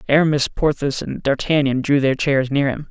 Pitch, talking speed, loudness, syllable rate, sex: 140 Hz, 185 wpm, -19 LUFS, 5.1 syllables/s, male